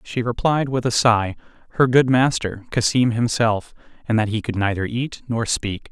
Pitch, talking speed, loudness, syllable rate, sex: 115 Hz, 180 wpm, -20 LUFS, 4.7 syllables/s, male